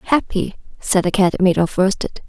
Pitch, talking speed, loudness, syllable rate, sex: 190 Hz, 185 wpm, -18 LUFS, 4.8 syllables/s, female